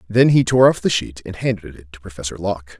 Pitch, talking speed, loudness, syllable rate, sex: 100 Hz, 260 wpm, -18 LUFS, 6.2 syllables/s, male